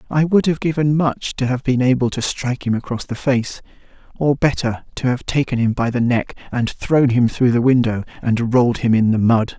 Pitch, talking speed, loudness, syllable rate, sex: 125 Hz, 220 wpm, -18 LUFS, 5.2 syllables/s, male